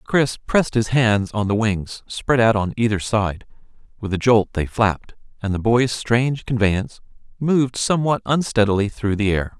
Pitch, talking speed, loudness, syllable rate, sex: 115 Hz, 175 wpm, -20 LUFS, 5.0 syllables/s, male